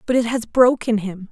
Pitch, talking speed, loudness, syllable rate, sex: 225 Hz, 230 wpm, -18 LUFS, 5.1 syllables/s, female